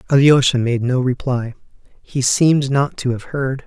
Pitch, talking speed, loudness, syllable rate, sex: 130 Hz, 165 wpm, -17 LUFS, 4.6 syllables/s, male